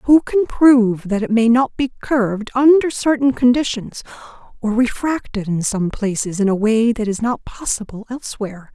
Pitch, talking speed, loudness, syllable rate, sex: 235 Hz, 170 wpm, -17 LUFS, 4.9 syllables/s, female